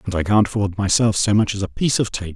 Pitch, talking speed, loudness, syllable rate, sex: 105 Hz, 305 wpm, -19 LUFS, 6.5 syllables/s, male